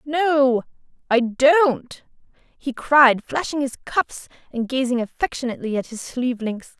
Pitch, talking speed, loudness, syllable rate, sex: 260 Hz, 135 wpm, -20 LUFS, 4.1 syllables/s, female